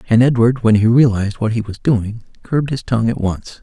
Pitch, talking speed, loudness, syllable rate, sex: 115 Hz, 230 wpm, -16 LUFS, 5.9 syllables/s, male